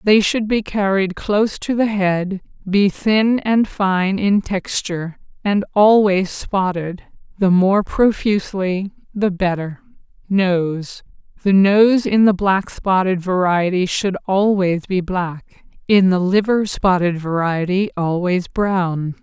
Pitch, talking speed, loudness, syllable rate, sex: 190 Hz, 120 wpm, -17 LUFS, 3.6 syllables/s, female